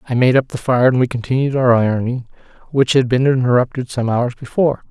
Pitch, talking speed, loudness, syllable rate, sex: 125 Hz, 210 wpm, -16 LUFS, 6.2 syllables/s, male